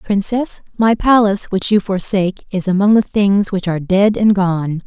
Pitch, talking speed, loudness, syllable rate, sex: 195 Hz, 185 wpm, -15 LUFS, 4.9 syllables/s, female